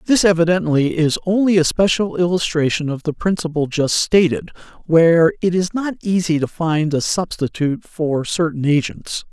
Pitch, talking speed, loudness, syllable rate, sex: 165 Hz, 155 wpm, -17 LUFS, 4.9 syllables/s, male